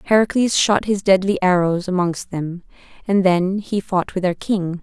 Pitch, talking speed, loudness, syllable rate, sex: 185 Hz, 175 wpm, -19 LUFS, 4.6 syllables/s, female